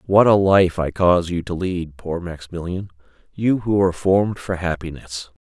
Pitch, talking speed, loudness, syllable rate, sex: 90 Hz, 175 wpm, -20 LUFS, 5.0 syllables/s, male